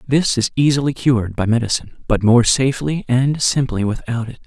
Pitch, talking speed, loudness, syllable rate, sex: 125 Hz, 175 wpm, -17 LUFS, 5.6 syllables/s, male